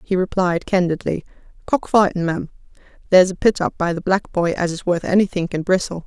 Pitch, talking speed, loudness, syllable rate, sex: 180 Hz, 200 wpm, -19 LUFS, 5.9 syllables/s, female